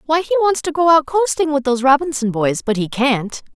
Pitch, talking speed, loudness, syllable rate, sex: 275 Hz, 235 wpm, -16 LUFS, 5.6 syllables/s, female